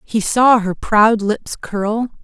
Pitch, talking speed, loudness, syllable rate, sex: 215 Hz, 160 wpm, -16 LUFS, 3.1 syllables/s, female